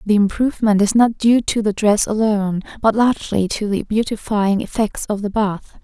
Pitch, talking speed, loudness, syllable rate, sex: 210 Hz, 185 wpm, -18 LUFS, 5.1 syllables/s, female